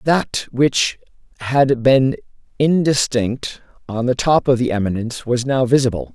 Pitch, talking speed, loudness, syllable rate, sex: 125 Hz, 135 wpm, -17 LUFS, 4.3 syllables/s, male